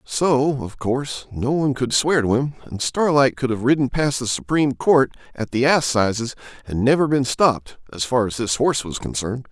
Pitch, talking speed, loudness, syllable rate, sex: 125 Hz, 200 wpm, -20 LUFS, 5.3 syllables/s, male